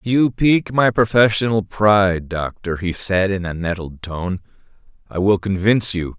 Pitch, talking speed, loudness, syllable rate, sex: 100 Hz, 155 wpm, -18 LUFS, 4.6 syllables/s, male